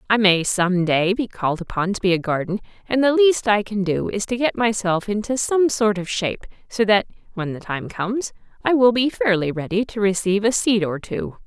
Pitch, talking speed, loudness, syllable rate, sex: 205 Hz, 225 wpm, -20 LUFS, 5.3 syllables/s, female